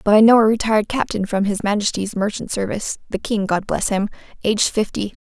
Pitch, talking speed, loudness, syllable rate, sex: 210 Hz, 185 wpm, -19 LUFS, 6.2 syllables/s, female